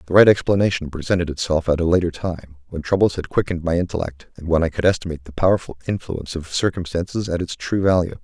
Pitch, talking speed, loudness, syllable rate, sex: 85 Hz, 210 wpm, -21 LUFS, 6.7 syllables/s, male